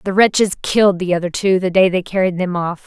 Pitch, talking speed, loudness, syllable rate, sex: 185 Hz, 250 wpm, -16 LUFS, 5.9 syllables/s, female